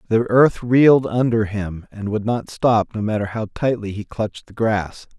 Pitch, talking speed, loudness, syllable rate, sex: 110 Hz, 195 wpm, -19 LUFS, 4.7 syllables/s, male